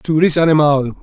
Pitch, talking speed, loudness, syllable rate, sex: 150 Hz, 175 wpm, -13 LUFS, 5.4 syllables/s, male